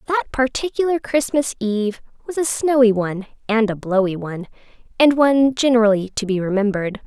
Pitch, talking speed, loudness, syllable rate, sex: 235 Hz, 155 wpm, -19 LUFS, 5.9 syllables/s, female